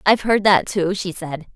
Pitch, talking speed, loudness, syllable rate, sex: 185 Hz, 230 wpm, -18 LUFS, 5.0 syllables/s, female